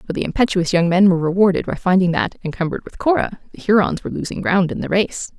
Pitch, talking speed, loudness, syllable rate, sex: 185 Hz, 235 wpm, -18 LUFS, 6.8 syllables/s, female